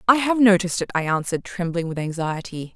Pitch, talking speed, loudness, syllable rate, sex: 185 Hz, 195 wpm, -21 LUFS, 6.3 syllables/s, female